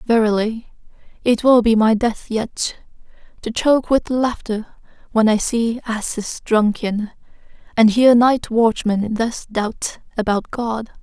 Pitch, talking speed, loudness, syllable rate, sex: 225 Hz, 125 wpm, -18 LUFS, 3.8 syllables/s, female